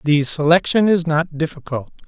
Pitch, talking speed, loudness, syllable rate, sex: 160 Hz, 145 wpm, -17 LUFS, 4.8 syllables/s, male